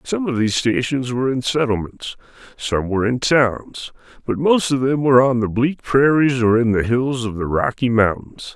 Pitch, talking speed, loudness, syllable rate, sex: 125 Hz, 195 wpm, -18 LUFS, 4.9 syllables/s, male